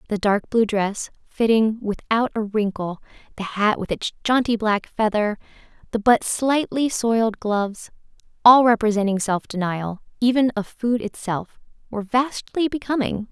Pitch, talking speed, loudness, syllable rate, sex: 220 Hz, 130 wpm, -21 LUFS, 4.6 syllables/s, female